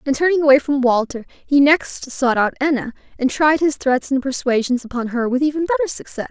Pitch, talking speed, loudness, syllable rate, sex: 270 Hz, 210 wpm, -18 LUFS, 5.7 syllables/s, female